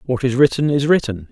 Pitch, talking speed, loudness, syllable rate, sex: 130 Hz, 225 wpm, -17 LUFS, 5.5 syllables/s, male